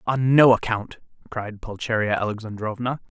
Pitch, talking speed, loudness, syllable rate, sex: 115 Hz, 115 wpm, -22 LUFS, 4.9 syllables/s, male